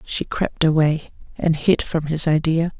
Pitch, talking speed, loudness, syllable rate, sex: 160 Hz, 170 wpm, -20 LUFS, 4.1 syllables/s, female